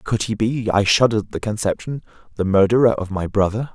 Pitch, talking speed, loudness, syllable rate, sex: 110 Hz, 210 wpm, -19 LUFS, 4.2 syllables/s, male